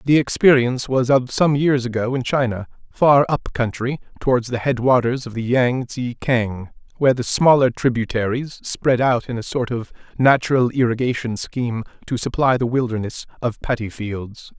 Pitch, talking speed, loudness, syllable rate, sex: 125 Hz, 170 wpm, -19 LUFS, 5.0 syllables/s, male